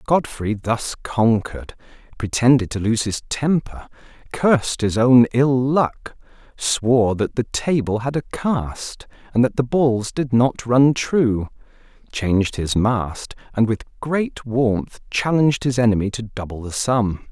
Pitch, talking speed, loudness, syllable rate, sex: 120 Hz, 145 wpm, -20 LUFS, 4.0 syllables/s, male